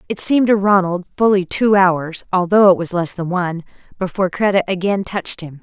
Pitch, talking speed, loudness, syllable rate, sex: 185 Hz, 190 wpm, -16 LUFS, 5.7 syllables/s, female